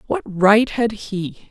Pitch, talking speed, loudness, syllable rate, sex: 205 Hz, 160 wpm, -18 LUFS, 3.0 syllables/s, female